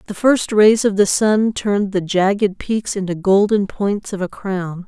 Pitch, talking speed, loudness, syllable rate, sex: 200 Hz, 195 wpm, -17 LUFS, 4.3 syllables/s, female